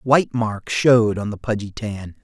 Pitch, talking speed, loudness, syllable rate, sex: 110 Hz, 190 wpm, -20 LUFS, 4.6 syllables/s, male